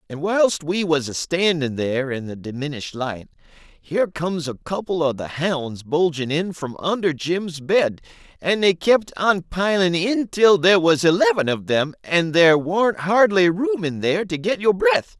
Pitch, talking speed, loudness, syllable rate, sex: 165 Hz, 185 wpm, -20 LUFS, 4.4 syllables/s, male